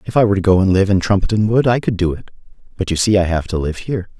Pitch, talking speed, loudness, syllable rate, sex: 100 Hz, 315 wpm, -16 LUFS, 7.2 syllables/s, male